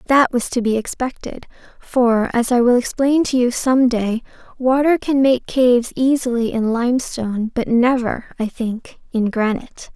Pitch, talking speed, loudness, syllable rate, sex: 245 Hz, 165 wpm, -18 LUFS, 4.6 syllables/s, female